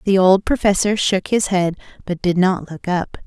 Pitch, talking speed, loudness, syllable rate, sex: 190 Hz, 200 wpm, -18 LUFS, 4.7 syllables/s, female